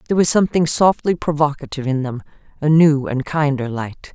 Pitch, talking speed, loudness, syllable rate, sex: 145 Hz, 160 wpm, -18 LUFS, 5.8 syllables/s, female